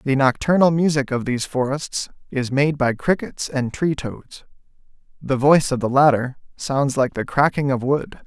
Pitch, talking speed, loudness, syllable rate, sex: 140 Hz, 175 wpm, -20 LUFS, 4.7 syllables/s, male